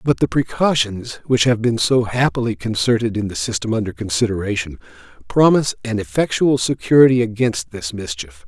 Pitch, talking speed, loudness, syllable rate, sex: 110 Hz, 150 wpm, -18 LUFS, 5.4 syllables/s, male